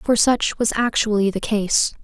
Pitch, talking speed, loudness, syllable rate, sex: 215 Hz, 175 wpm, -19 LUFS, 4.2 syllables/s, female